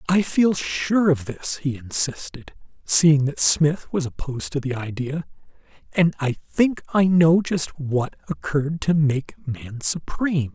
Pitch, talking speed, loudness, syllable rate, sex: 150 Hz, 155 wpm, -22 LUFS, 4.0 syllables/s, male